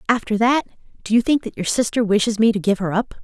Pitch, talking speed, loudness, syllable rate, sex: 220 Hz, 260 wpm, -19 LUFS, 6.5 syllables/s, female